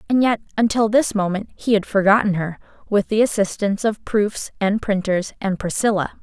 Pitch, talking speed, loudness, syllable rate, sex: 205 Hz, 175 wpm, -20 LUFS, 5.3 syllables/s, female